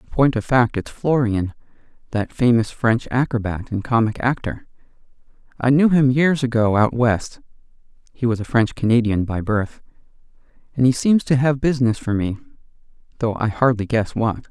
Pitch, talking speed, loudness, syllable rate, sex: 120 Hz, 165 wpm, -19 LUFS, 4.4 syllables/s, male